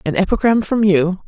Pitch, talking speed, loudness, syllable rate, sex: 195 Hz, 190 wpm, -16 LUFS, 5.3 syllables/s, female